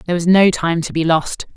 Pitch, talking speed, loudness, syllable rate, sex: 170 Hz, 270 wpm, -15 LUFS, 6.0 syllables/s, female